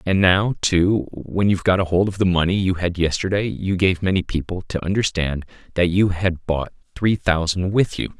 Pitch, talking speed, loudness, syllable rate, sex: 90 Hz, 200 wpm, -20 LUFS, 4.7 syllables/s, male